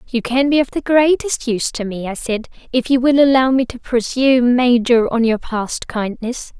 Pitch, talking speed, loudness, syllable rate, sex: 245 Hz, 210 wpm, -16 LUFS, 4.9 syllables/s, female